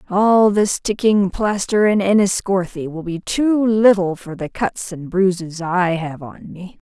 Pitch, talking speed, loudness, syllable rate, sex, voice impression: 190 Hz, 165 wpm, -18 LUFS, 4.0 syllables/s, female, very feminine, slightly young, slightly adult-like, slightly thin, very tensed, powerful, very bright, soft, very clear, fluent, very cute, slightly cool, intellectual, very refreshing, sincere, slightly calm, friendly, reassuring, very unique, slightly elegant, wild, sweet, very lively, kind, intense